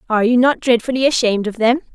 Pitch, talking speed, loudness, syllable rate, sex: 240 Hz, 215 wpm, -16 LUFS, 7.2 syllables/s, female